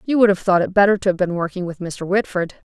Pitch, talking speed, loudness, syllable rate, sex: 190 Hz, 285 wpm, -19 LUFS, 6.3 syllables/s, female